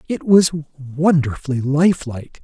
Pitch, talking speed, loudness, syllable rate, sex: 150 Hz, 125 wpm, -17 LUFS, 3.6 syllables/s, male